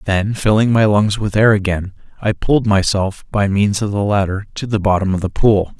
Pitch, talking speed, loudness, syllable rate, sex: 100 Hz, 220 wpm, -16 LUFS, 5.2 syllables/s, male